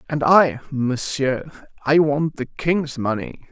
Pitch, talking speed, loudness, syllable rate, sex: 140 Hz, 135 wpm, -20 LUFS, 3.7 syllables/s, male